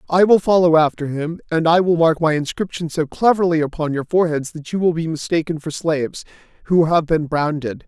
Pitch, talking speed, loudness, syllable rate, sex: 160 Hz, 205 wpm, -18 LUFS, 5.6 syllables/s, male